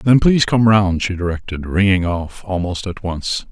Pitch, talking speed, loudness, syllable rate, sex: 95 Hz, 190 wpm, -17 LUFS, 4.6 syllables/s, male